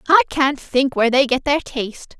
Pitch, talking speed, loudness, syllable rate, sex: 260 Hz, 220 wpm, -18 LUFS, 5.3 syllables/s, female